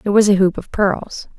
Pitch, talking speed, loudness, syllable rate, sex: 200 Hz, 260 wpm, -16 LUFS, 4.9 syllables/s, female